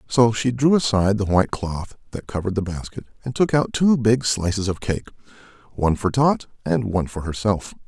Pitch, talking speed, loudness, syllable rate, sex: 105 Hz, 200 wpm, -21 LUFS, 5.7 syllables/s, male